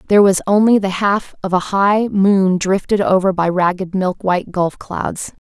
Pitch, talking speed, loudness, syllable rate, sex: 190 Hz, 185 wpm, -16 LUFS, 4.6 syllables/s, female